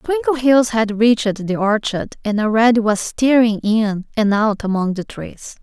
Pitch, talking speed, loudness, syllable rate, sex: 220 Hz, 160 wpm, -17 LUFS, 4.3 syllables/s, female